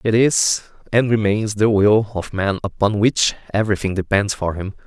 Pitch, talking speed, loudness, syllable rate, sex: 105 Hz, 175 wpm, -18 LUFS, 4.9 syllables/s, male